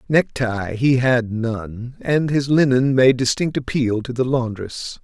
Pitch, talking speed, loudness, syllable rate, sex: 125 Hz, 155 wpm, -19 LUFS, 3.8 syllables/s, male